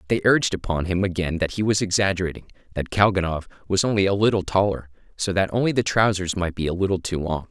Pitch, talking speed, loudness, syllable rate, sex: 95 Hz, 215 wpm, -22 LUFS, 6.4 syllables/s, male